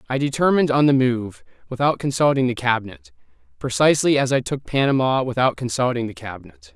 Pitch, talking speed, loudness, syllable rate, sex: 135 Hz, 160 wpm, -20 LUFS, 6.1 syllables/s, male